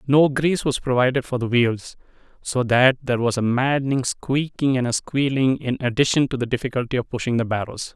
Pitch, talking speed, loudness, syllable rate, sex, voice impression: 130 Hz, 190 wpm, -21 LUFS, 5.5 syllables/s, male, masculine, middle-aged, tensed, slightly bright, clear, slightly halting, slightly calm, friendly, lively, kind, slightly modest